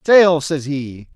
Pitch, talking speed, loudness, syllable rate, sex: 155 Hz, 155 wpm, -16 LUFS, 3.1 syllables/s, male